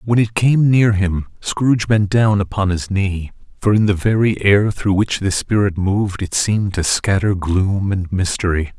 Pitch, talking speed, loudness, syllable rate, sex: 100 Hz, 190 wpm, -17 LUFS, 4.5 syllables/s, male